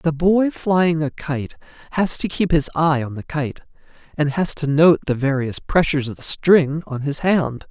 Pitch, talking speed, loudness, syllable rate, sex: 155 Hz, 200 wpm, -19 LUFS, 4.4 syllables/s, male